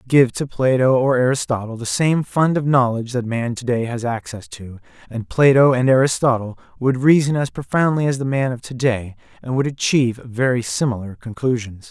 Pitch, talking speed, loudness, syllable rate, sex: 125 Hz, 185 wpm, -18 LUFS, 5.3 syllables/s, male